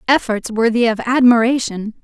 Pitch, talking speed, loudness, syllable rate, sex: 235 Hz, 120 wpm, -15 LUFS, 5.0 syllables/s, female